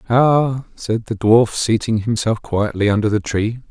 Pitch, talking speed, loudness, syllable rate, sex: 110 Hz, 160 wpm, -17 LUFS, 4.2 syllables/s, male